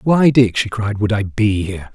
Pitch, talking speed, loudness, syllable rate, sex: 110 Hz, 245 wpm, -16 LUFS, 4.9 syllables/s, male